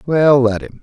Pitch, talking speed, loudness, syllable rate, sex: 130 Hz, 220 wpm, -13 LUFS, 4.4 syllables/s, male